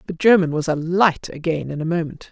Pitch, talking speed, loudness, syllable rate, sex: 165 Hz, 205 wpm, -19 LUFS, 5.7 syllables/s, female